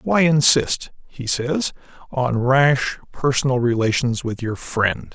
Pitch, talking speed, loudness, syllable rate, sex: 125 Hz, 130 wpm, -20 LUFS, 3.6 syllables/s, male